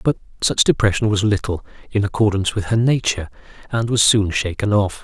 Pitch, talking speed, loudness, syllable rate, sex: 105 Hz, 180 wpm, -18 LUFS, 5.9 syllables/s, male